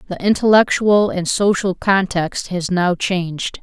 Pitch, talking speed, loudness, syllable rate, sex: 185 Hz, 130 wpm, -17 LUFS, 4.1 syllables/s, female